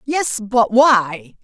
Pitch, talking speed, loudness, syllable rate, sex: 230 Hz, 125 wpm, -15 LUFS, 2.4 syllables/s, female